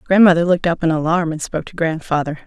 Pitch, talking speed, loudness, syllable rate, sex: 165 Hz, 220 wpm, -17 LUFS, 7.0 syllables/s, female